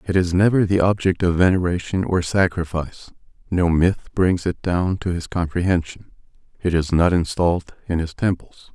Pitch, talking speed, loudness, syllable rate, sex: 90 Hz, 165 wpm, -20 LUFS, 5.1 syllables/s, male